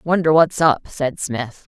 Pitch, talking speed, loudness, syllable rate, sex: 150 Hz, 170 wpm, -18 LUFS, 3.7 syllables/s, female